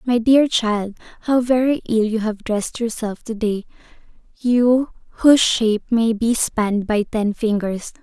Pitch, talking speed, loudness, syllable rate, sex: 225 Hz, 150 wpm, -19 LUFS, 4.4 syllables/s, female